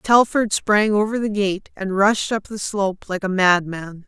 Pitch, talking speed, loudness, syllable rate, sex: 200 Hz, 190 wpm, -19 LUFS, 4.3 syllables/s, female